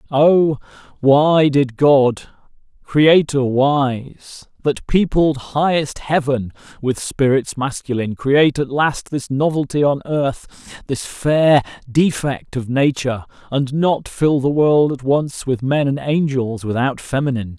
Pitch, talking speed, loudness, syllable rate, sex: 140 Hz, 130 wpm, -17 LUFS, 3.7 syllables/s, male